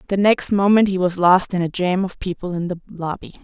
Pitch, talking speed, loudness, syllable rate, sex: 185 Hz, 245 wpm, -19 LUFS, 5.5 syllables/s, female